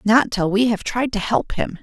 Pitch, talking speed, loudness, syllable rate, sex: 215 Hz, 265 wpm, -20 LUFS, 4.7 syllables/s, female